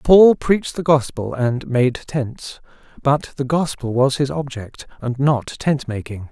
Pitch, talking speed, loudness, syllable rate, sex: 130 Hz, 160 wpm, -19 LUFS, 3.9 syllables/s, male